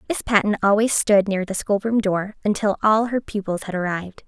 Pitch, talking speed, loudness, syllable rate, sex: 205 Hz, 195 wpm, -21 LUFS, 5.4 syllables/s, female